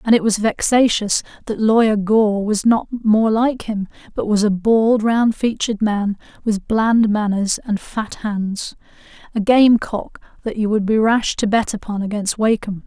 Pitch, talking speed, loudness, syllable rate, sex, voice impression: 215 Hz, 175 wpm, -18 LUFS, 4.3 syllables/s, female, very feminine, young, very thin, relaxed, slightly powerful, bright, hard, slightly clear, fluent, slightly raspy, very cute, intellectual, very refreshing, sincere, calm, very friendly, reassuring, very unique, elegant, slightly wild, sweet, slightly lively, slightly strict, slightly intense, slightly sharp, modest